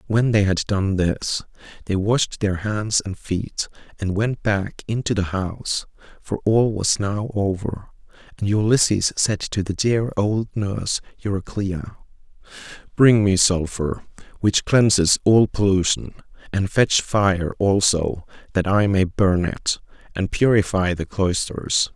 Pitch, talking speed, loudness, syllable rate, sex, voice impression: 100 Hz, 140 wpm, -21 LUFS, 3.9 syllables/s, male, very masculine, middle-aged, very thick, tensed, powerful, slightly bright, soft, slightly muffled, fluent, raspy, cool, slightly intellectual, slightly refreshing, sincere, very calm, very friendly, very reassuring, very unique, elegant, wild, lively, kind, slightly modest